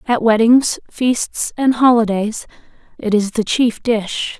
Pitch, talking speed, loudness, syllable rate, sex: 230 Hz, 135 wpm, -16 LUFS, 3.6 syllables/s, female